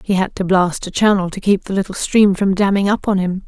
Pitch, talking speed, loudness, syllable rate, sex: 195 Hz, 275 wpm, -16 LUFS, 5.6 syllables/s, female